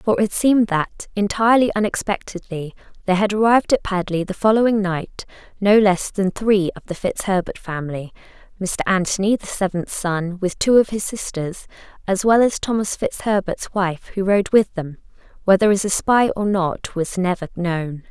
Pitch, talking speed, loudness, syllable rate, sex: 195 Hz, 170 wpm, -19 LUFS, 4.9 syllables/s, female